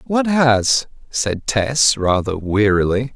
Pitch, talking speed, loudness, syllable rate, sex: 120 Hz, 115 wpm, -17 LUFS, 3.2 syllables/s, male